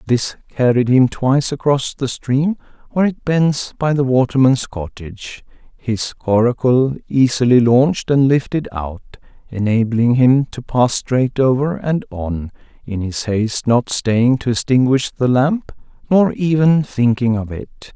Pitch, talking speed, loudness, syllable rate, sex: 130 Hz, 145 wpm, -16 LUFS, 4.1 syllables/s, male